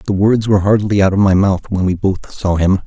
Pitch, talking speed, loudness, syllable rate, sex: 100 Hz, 270 wpm, -14 LUFS, 5.6 syllables/s, male